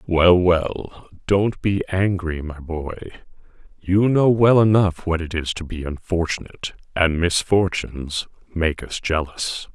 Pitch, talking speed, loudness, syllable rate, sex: 90 Hz, 135 wpm, -20 LUFS, 4.0 syllables/s, male